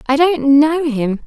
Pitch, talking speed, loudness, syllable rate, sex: 285 Hz, 190 wpm, -14 LUFS, 3.6 syllables/s, female